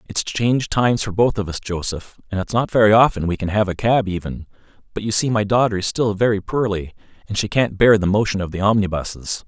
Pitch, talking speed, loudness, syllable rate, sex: 105 Hz, 235 wpm, -19 LUFS, 6.0 syllables/s, male